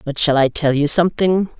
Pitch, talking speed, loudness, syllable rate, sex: 155 Hz, 225 wpm, -16 LUFS, 5.6 syllables/s, female